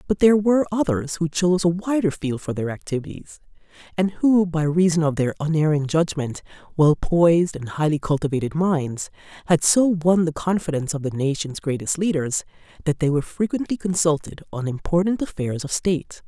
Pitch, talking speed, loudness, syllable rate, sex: 160 Hz, 170 wpm, -21 LUFS, 5.5 syllables/s, female